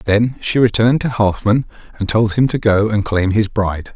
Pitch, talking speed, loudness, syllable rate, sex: 110 Hz, 215 wpm, -16 LUFS, 5.0 syllables/s, male